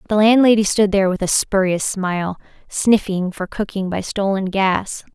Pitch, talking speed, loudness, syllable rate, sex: 195 Hz, 165 wpm, -18 LUFS, 4.8 syllables/s, female